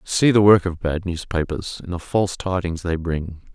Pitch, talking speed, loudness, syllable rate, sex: 90 Hz, 205 wpm, -21 LUFS, 4.7 syllables/s, male